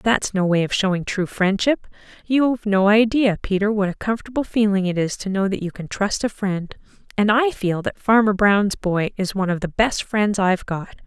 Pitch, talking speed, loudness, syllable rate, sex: 200 Hz, 215 wpm, -20 LUFS, 5.2 syllables/s, female